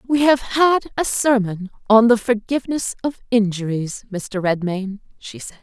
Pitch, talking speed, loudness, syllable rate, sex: 225 Hz, 150 wpm, -19 LUFS, 4.5 syllables/s, female